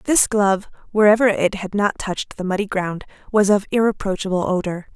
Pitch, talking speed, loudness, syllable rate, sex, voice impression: 195 Hz, 170 wpm, -19 LUFS, 5.7 syllables/s, female, very feminine, slightly young, slightly adult-like, very thin, tensed, slightly powerful, bright, hard, very clear, fluent, cute, slightly cool, intellectual, very refreshing, sincere, slightly calm, friendly, slightly reassuring, slightly unique, wild, very lively, strict, intense